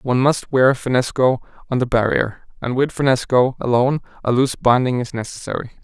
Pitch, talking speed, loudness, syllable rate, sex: 125 Hz, 165 wpm, -19 LUFS, 5.8 syllables/s, male